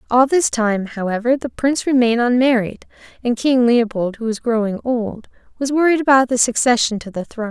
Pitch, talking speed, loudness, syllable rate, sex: 240 Hz, 185 wpm, -17 LUFS, 5.6 syllables/s, female